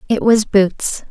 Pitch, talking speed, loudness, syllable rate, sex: 210 Hz, 160 wpm, -15 LUFS, 3.3 syllables/s, female